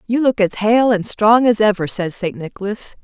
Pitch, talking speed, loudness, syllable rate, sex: 210 Hz, 215 wpm, -16 LUFS, 4.9 syllables/s, female